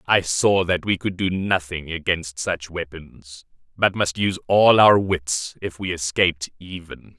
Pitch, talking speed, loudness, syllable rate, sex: 90 Hz, 165 wpm, -20 LUFS, 4.1 syllables/s, male